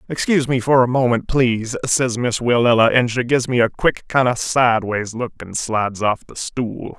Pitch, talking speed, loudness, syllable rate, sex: 120 Hz, 205 wpm, -18 LUFS, 5.1 syllables/s, male